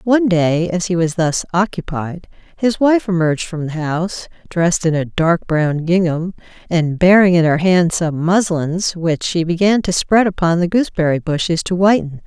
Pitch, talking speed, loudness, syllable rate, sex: 175 Hz, 180 wpm, -16 LUFS, 4.8 syllables/s, female